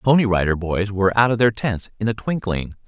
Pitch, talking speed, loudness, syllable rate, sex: 105 Hz, 250 wpm, -20 LUFS, 6.3 syllables/s, male